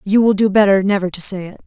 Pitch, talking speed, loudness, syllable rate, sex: 195 Hz, 290 wpm, -15 LUFS, 6.5 syllables/s, female